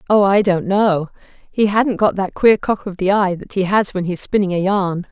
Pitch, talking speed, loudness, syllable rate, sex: 195 Hz, 245 wpm, -17 LUFS, 4.8 syllables/s, female